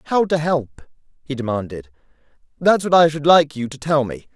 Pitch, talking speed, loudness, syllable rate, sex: 145 Hz, 195 wpm, -18 LUFS, 5.3 syllables/s, male